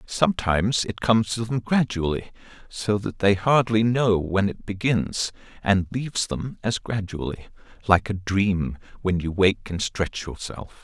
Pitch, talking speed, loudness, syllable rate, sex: 105 Hz, 155 wpm, -24 LUFS, 4.3 syllables/s, male